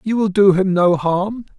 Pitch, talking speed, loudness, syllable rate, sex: 195 Hz, 225 wpm, -16 LUFS, 4.4 syllables/s, male